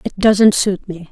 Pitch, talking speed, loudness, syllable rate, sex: 195 Hz, 215 wpm, -14 LUFS, 4.2 syllables/s, female